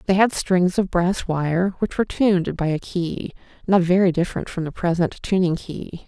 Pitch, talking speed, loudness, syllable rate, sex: 180 Hz, 200 wpm, -21 LUFS, 4.9 syllables/s, female